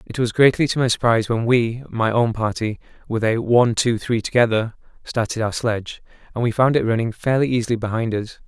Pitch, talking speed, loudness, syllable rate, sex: 115 Hz, 190 wpm, -20 LUFS, 5.9 syllables/s, male